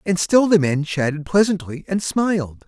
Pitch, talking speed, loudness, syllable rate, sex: 170 Hz, 180 wpm, -19 LUFS, 4.7 syllables/s, male